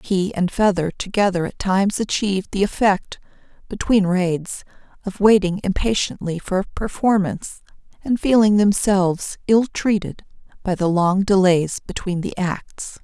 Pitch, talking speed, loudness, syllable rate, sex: 195 Hz, 135 wpm, -19 LUFS, 4.5 syllables/s, female